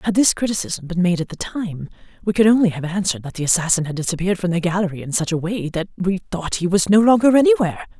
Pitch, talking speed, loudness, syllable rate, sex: 185 Hz, 250 wpm, -19 LUFS, 6.8 syllables/s, female